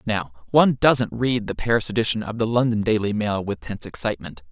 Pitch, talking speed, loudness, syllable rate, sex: 110 Hz, 200 wpm, -21 LUFS, 6.0 syllables/s, male